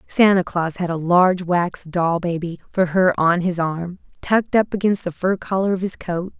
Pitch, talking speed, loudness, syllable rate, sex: 180 Hz, 205 wpm, -20 LUFS, 4.8 syllables/s, female